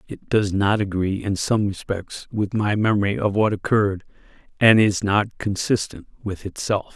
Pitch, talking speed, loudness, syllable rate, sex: 100 Hz, 165 wpm, -21 LUFS, 4.7 syllables/s, male